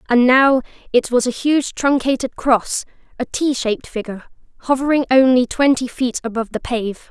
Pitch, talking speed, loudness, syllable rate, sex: 255 Hz, 160 wpm, -17 LUFS, 5.2 syllables/s, female